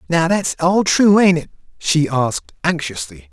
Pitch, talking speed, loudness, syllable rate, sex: 150 Hz, 165 wpm, -16 LUFS, 4.4 syllables/s, male